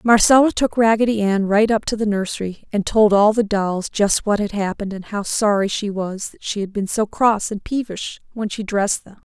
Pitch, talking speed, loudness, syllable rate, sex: 210 Hz, 225 wpm, -19 LUFS, 5.2 syllables/s, female